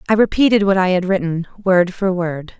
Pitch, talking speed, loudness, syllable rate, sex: 185 Hz, 210 wpm, -16 LUFS, 5.2 syllables/s, female